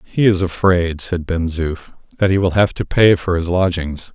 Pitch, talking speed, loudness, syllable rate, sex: 90 Hz, 215 wpm, -17 LUFS, 4.7 syllables/s, male